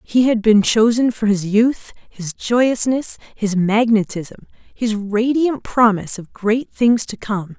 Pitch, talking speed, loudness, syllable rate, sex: 220 Hz, 150 wpm, -17 LUFS, 3.8 syllables/s, female